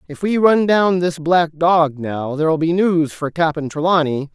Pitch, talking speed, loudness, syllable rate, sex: 165 Hz, 195 wpm, -17 LUFS, 4.1 syllables/s, male